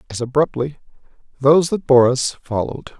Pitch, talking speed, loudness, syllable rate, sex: 130 Hz, 140 wpm, -18 LUFS, 5.9 syllables/s, male